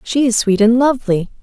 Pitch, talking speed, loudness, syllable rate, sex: 235 Hz, 210 wpm, -14 LUFS, 5.7 syllables/s, female